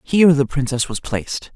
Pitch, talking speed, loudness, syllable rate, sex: 135 Hz, 195 wpm, -18 LUFS, 5.6 syllables/s, male